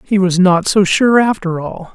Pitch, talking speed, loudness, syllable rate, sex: 190 Hz, 215 wpm, -13 LUFS, 4.5 syllables/s, male